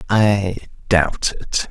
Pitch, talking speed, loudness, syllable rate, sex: 100 Hz, 105 wpm, -19 LUFS, 2.6 syllables/s, male